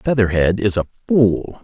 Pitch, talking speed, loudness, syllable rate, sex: 110 Hz, 145 wpm, -17 LUFS, 4.4 syllables/s, male